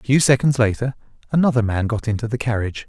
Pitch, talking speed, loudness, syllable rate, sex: 120 Hz, 210 wpm, -19 LUFS, 6.9 syllables/s, male